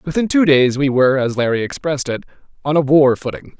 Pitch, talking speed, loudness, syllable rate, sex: 140 Hz, 215 wpm, -16 LUFS, 6.1 syllables/s, male